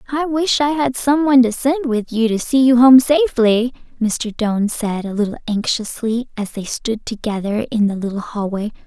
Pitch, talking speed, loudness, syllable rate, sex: 240 Hz, 190 wpm, -17 LUFS, 5.1 syllables/s, female